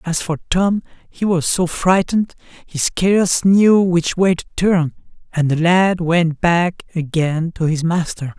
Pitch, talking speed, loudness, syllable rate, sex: 170 Hz, 165 wpm, -17 LUFS, 4.0 syllables/s, male